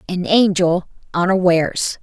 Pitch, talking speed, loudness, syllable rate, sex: 180 Hz, 90 wpm, -17 LUFS, 4.3 syllables/s, female